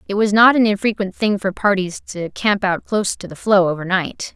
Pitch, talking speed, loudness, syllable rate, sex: 200 Hz, 235 wpm, -18 LUFS, 5.3 syllables/s, female